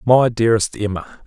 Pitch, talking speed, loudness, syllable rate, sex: 110 Hz, 145 wpm, -17 LUFS, 6.3 syllables/s, male